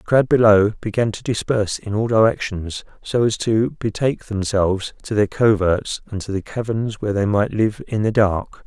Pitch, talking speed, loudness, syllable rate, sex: 105 Hz, 195 wpm, -19 LUFS, 5.0 syllables/s, male